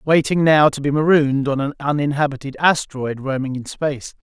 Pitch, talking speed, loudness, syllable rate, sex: 145 Hz, 165 wpm, -18 LUFS, 5.7 syllables/s, male